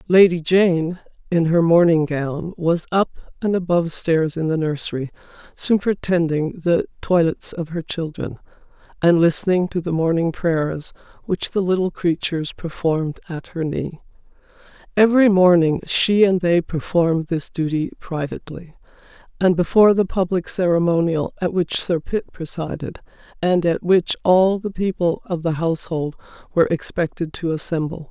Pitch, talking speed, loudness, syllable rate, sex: 170 Hz, 140 wpm, -20 LUFS, 4.9 syllables/s, female